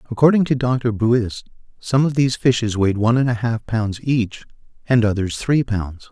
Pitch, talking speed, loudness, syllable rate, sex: 115 Hz, 185 wpm, -19 LUFS, 5.0 syllables/s, male